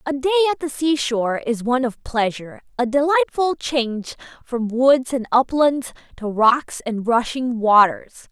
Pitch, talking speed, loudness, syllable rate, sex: 255 Hz, 150 wpm, -19 LUFS, 4.4 syllables/s, female